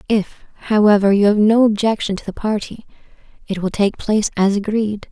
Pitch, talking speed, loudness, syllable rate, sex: 210 Hz, 175 wpm, -17 LUFS, 5.5 syllables/s, female